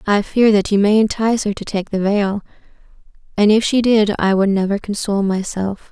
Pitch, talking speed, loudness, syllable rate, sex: 205 Hz, 205 wpm, -16 LUFS, 5.4 syllables/s, female